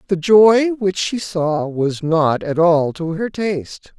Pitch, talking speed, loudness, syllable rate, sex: 175 Hz, 180 wpm, -17 LUFS, 3.5 syllables/s, female